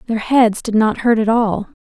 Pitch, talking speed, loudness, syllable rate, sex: 225 Hz, 230 wpm, -15 LUFS, 4.6 syllables/s, female